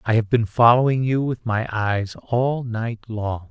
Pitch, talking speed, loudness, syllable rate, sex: 115 Hz, 190 wpm, -21 LUFS, 4.0 syllables/s, male